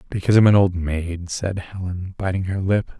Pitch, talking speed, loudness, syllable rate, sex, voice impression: 95 Hz, 200 wpm, -21 LUFS, 5.1 syllables/s, male, very masculine, very middle-aged, very thick, very relaxed, very weak, very dark, very soft, very muffled, halting, very cool, intellectual, very sincere, very calm, very mature, very friendly, reassuring, very unique, very elegant, wild, very sweet, slightly lively, very kind, modest